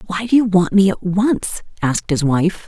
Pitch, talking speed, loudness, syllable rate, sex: 190 Hz, 225 wpm, -17 LUFS, 4.8 syllables/s, female